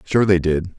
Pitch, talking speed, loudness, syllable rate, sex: 90 Hz, 230 wpm, -18 LUFS, 4.4 syllables/s, male